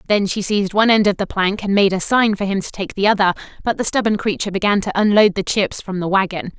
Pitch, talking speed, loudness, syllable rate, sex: 200 Hz, 275 wpm, -17 LUFS, 6.5 syllables/s, female